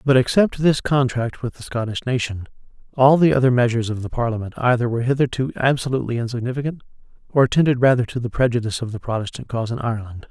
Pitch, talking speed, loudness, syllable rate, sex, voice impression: 125 Hz, 185 wpm, -20 LUFS, 6.9 syllables/s, male, very masculine, middle-aged, very thick, tensed, powerful, dark, slightly hard, muffled, fluent, raspy, cool, very intellectual, slightly refreshing, sincere, very calm, mature, very friendly, reassuring, unique, elegant, wild, sweet, lively, kind, modest